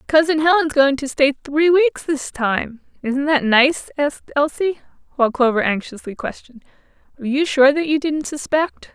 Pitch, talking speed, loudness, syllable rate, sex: 285 Hz, 160 wpm, -18 LUFS, 4.9 syllables/s, female